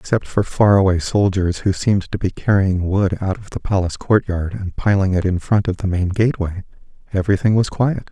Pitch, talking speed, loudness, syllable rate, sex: 95 Hz, 205 wpm, -18 LUFS, 5.6 syllables/s, male